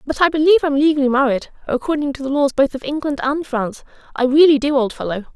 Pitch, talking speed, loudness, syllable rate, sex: 280 Hz, 225 wpm, -17 LUFS, 6.7 syllables/s, female